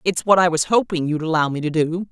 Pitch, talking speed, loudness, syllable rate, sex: 170 Hz, 285 wpm, -19 LUFS, 6.0 syllables/s, female